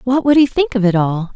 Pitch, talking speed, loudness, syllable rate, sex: 235 Hz, 310 wpm, -14 LUFS, 5.7 syllables/s, female